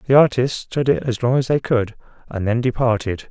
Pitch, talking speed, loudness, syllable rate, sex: 120 Hz, 220 wpm, -19 LUFS, 5.3 syllables/s, male